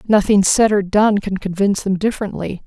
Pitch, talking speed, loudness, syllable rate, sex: 200 Hz, 180 wpm, -16 LUFS, 5.6 syllables/s, female